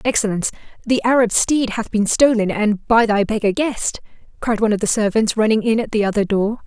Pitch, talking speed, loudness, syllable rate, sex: 220 Hz, 205 wpm, -18 LUFS, 5.8 syllables/s, female